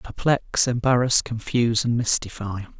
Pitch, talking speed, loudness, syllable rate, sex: 120 Hz, 110 wpm, -21 LUFS, 4.6 syllables/s, male